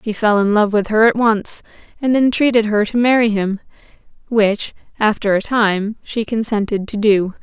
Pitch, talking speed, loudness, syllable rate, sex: 215 Hz, 180 wpm, -16 LUFS, 4.7 syllables/s, female